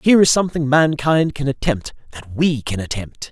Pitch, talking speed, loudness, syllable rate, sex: 145 Hz, 180 wpm, -18 LUFS, 5.3 syllables/s, male